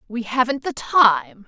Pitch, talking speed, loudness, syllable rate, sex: 245 Hz, 160 wpm, -19 LUFS, 3.8 syllables/s, female